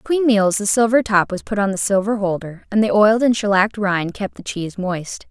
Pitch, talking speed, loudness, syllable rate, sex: 205 Hz, 235 wpm, -18 LUFS, 5.5 syllables/s, female